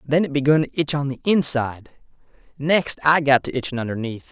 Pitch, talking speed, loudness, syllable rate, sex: 140 Hz, 195 wpm, -20 LUFS, 5.9 syllables/s, male